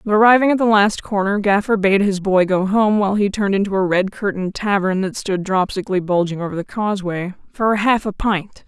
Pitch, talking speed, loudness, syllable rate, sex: 200 Hz, 220 wpm, -18 LUFS, 5.8 syllables/s, female